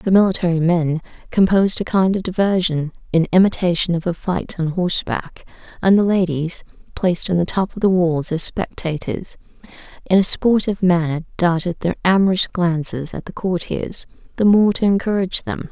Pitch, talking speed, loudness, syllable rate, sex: 180 Hz, 165 wpm, -18 LUFS, 5.3 syllables/s, female